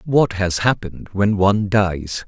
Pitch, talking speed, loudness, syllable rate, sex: 95 Hz, 160 wpm, -19 LUFS, 4.2 syllables/s, male